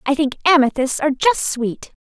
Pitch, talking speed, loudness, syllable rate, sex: 285 Hz, 175 wpm, -17 LUFS, 5.2 syllables/s, female